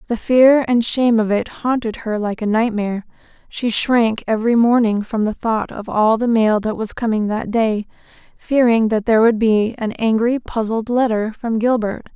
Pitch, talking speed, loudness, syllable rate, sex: 225 Hz, 190 wpm, -17 LUFS, 4.8 syllables/s, female